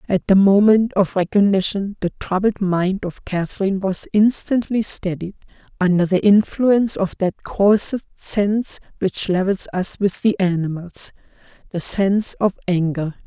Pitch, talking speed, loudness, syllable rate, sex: 195 Hz, 130 wpm, -19 LUFS, 4.7 syllables/s, female